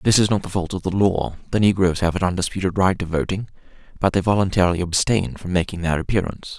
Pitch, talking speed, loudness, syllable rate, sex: 95 Hz, 220 wpm, -21 LUFS, 6.5 syllables/s, male